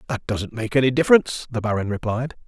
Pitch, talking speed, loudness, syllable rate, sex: 120 Hz, 195 wpm, -21 LUFS, 6.6 syllables/s, male